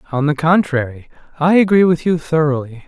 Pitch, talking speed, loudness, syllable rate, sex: 155 Hz, 165 wpm, -15 LUFS, 5.6 syllables/s, male